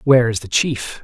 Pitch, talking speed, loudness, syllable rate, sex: 120 Hz, 230 wpm, -17 LUFS, 5.4 syllables/s, male